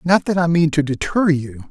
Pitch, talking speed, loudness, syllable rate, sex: 160 Hz, 245 wpm, -18 LUFS, 5.0 syllables/s, male